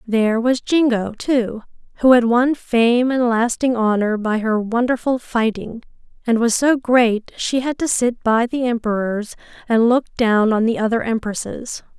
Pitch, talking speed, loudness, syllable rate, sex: 235 Hz, 165 wpm, -18 LUFS, 4.3 syllables/s, female